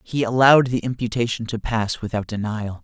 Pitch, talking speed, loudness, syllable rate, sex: 115 Hz, 170 wpm, -20 LUFS, 5.5 syllables/s, male